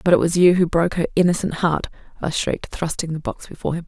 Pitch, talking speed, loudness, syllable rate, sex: 170 Hz, 250 wpm, -20 LUFS, 6.9 syllables/s, female